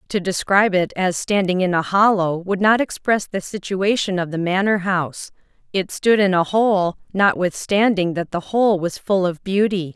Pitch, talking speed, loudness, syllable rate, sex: 190 Hz, 180 wpm, -19 LUFS, 4.7 syllables/s, female